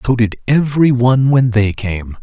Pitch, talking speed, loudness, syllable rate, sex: 120 Hz, 190 wpm, -14 LUFS, 5.2 syllables/s, male